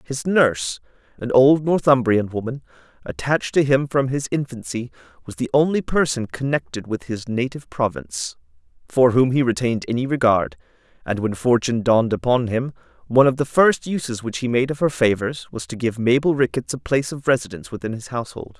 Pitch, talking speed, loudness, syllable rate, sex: 125 Hz, 180 wpm, -20 LUFS, 5.8 syllables/s, male